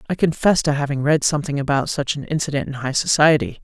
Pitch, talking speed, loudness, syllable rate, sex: 145 Hz, 215 wpm, -19 LUFS, 6.7 syllables/s, female